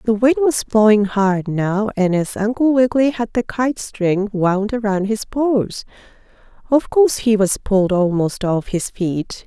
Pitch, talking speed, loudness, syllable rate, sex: 215 Hz, 170 wpm, -17 LUFS, 4.2 syllables/s, female